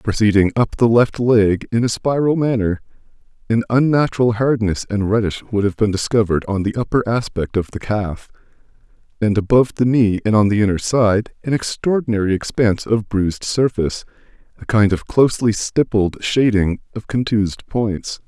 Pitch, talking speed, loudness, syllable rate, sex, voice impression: 110 Hz, 160 wpm, -18 LUFS, 5.2 syllables/s, male, very masculine, very adult-like, middle-aged, very thick, slightly relaxed, slightly powerful, weak, bright, slightly soft, slightly clear, fluent, slightly raspy, slightly cool, slightly intellectual, refreshing, sincere, calm, very mature, friendly, reassuring, elegant, slightly lively, kind